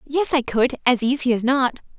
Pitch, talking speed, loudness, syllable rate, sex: 255 Hz, 210 wpm, -19 LUFS, 5.0 syllables/s, female